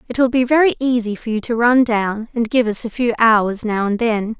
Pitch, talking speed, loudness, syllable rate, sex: 230 Hz, 260 wpm, -17 LUFS, 5.1 syllables/s, female